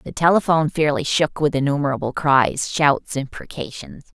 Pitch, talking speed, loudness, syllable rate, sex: 145 Hz, 130 wpm, -19 LUFS, 5.0 syllables/s, female